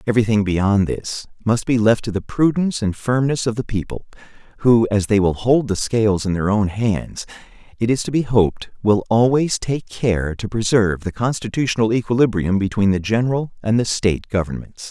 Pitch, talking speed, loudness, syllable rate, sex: 110 Hz, 190 wpm, -19 LUFS, 5.4 syllables/s, male